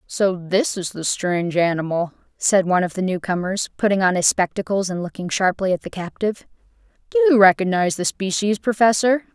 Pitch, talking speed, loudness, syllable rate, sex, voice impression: 195 Hz, 180 wpm, -20 LUFS, 5.7 syllables/s, female, feminine, slightly young, tensed, powerful, bright, slightly soft, clear, fluent, slightly cute, intellectual, calm, friendly, lively